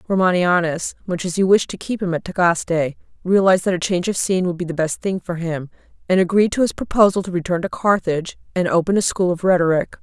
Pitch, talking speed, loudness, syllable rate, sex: 180 Hz, 225 wpm, -19 LUFS, 6.3 syllables/s, female